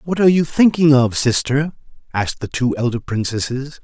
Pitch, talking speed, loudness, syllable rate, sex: 135 Hz, 170 wpm, -17 LUFS, 5.3 syllables/s, male